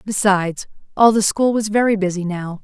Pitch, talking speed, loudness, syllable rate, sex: 200 Hz, 180 wpm, -17 LUFS, 5.3 syllables/s, female